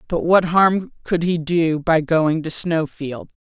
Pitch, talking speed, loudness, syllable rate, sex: 165 Hz, 175 wpm, -19 LUFS, 3.6 syllables/s, female